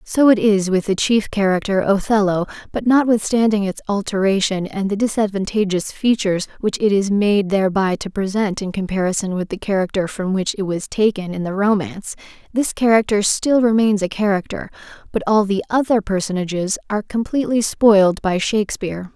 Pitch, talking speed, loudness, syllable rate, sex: 205 Hz, 165 wpm, -18 LUFS, 5.5 syllables/s, female